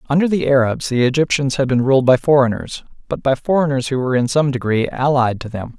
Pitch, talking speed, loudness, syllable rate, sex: 135 Hz, 220 wpm, -17 LUFS, 6.0 syllables/s, male